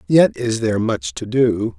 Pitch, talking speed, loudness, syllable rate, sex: 105 Hz, 200 wpm, -18 LUFS, 4.4 syllables/s, male